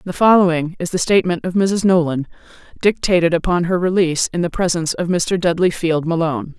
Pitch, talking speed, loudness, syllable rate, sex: 175 Hz, 180 wpm, -17 LUFS, 6.0 syllables/s, female